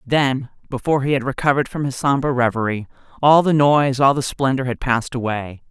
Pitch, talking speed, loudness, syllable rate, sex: 130 Hz, 190 wpm, -18 LUFS, 6.0 syllables/s, female